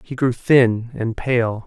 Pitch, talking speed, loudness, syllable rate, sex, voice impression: 120 Hz, 180 wpm, -19 LUFS, 3.3 syllables/s, male, masculine, adult-like, slightly middle-aged, slightly thick, slightly tensed, slightly powerful, bright, slightly hard, clear, fluent, cool, very intellectual, refreshing, very sincere, calm, slightly mature, very friendly, reassuring, unique, very elegant, slightly sweet, lively, kind, slightly modest, slightly light